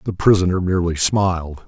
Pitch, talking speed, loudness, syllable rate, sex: 90 Hz, 145 wpm, -18 LUFS, 5.9 syllables/s, male